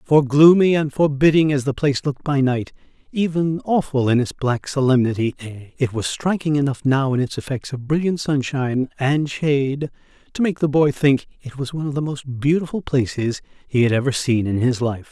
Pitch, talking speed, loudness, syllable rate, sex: 140 Hz, 195 wpm, -20 LUFS, 5.4 syllables/s, male